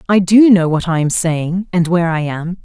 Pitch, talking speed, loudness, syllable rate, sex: 175 Hz, 250 wpm, -14 LUFS, 5.0 syllables/s, female